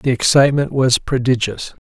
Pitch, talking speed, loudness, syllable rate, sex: 130 Hz, 130 wpm, -15 LUFS, 5.2 syllables/s, male